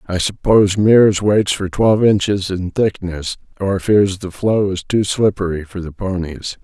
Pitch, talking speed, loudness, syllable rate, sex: 95 Hz, 170 wpm, -16 LUFS, 4.5 syllables/s, male